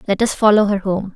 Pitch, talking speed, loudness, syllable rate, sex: 200 Hz, 260 wpm, -16 LUFS, 6.1 syllables/s, female